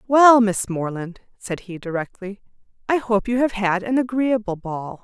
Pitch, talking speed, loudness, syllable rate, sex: 210 Hz, 165 wpm, -21 LUFS, 4.5 syllables/s, female